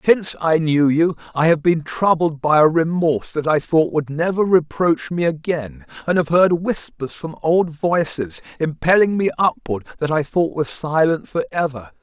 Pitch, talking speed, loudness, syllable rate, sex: 160 Hz, 180 wpm, -19 LUFS, 4.7 syllables/s, male